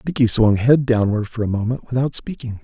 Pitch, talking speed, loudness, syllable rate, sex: 120 Hz, 205 wpm, -19 LUFS, 5.6 syllables/s, male